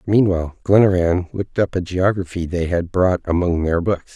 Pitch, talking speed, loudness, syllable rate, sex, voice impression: 90 Hz, 175 wpm, -19 LUFS, 5.2 syllables/s, male, masculine, middle-aged, thick, slightly relaxed, slightly powerful, bright, muffled, raspy, cool, calm, mature, friendly, reassuring, wild, lively, slightly kind